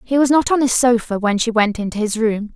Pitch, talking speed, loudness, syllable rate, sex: 230 Hz, 280 wpm, -17 LUFS, 5.7 syllables/s, female